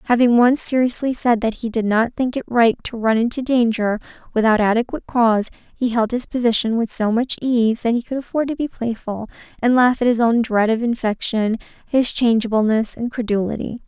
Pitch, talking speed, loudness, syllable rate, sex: 235 Hz, 195 wpm, -19 LUFS, 5.4 syllables/s, female